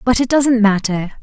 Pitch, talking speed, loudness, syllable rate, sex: 225 Hz, 195 wpm, -15 LUFS, 4.8 syllables/s, female